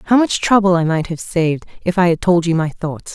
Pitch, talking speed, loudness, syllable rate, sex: 175 Hz, 265 wpm, -16 LUFS, 5.7 syllables/s, female